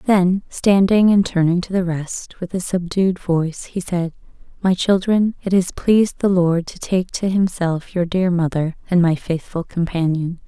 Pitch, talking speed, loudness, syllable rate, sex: 180 Hz, 180 wpm, -19 LUFS, 4.4 syllables/s, female